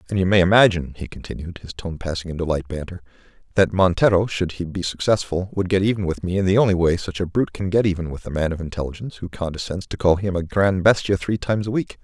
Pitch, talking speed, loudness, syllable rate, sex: 90 Hz, 250 wpm, -21 LUFS, 6.7 syllables/s, male